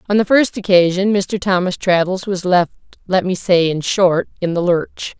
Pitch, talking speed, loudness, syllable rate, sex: 185 Hz, 185 wpm, -16 LUFS, 4.7 syllables/s, female